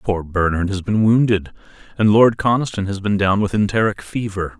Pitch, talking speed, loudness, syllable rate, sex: 100 Hz, 185 wpm, -18 LUFS, 5.2 syllables/s, male